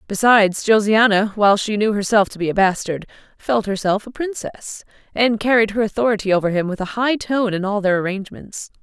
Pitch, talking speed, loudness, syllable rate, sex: 210 Hz, 190 wpm, -18 LUFS, 5.7 syllables/s, female